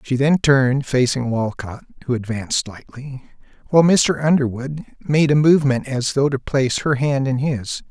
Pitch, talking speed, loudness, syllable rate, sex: 135 Hz, 165 wpm, -18 LUFS, 4.9 syllables/s, male